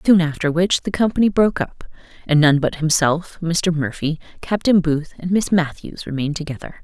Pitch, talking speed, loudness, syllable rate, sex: 165 Hz, 175 wpm, -19 LUFS, 5.3 syllables/s, female